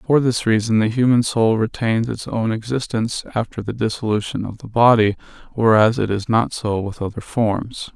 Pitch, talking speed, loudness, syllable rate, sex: 115 Hz, 180 wpm, -19 LUFS, 5.0 syllables/s, male